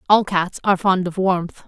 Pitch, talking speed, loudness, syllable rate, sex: 185 Hz, 215 wpm, -19 LUFS, 4.9 syllables/s, female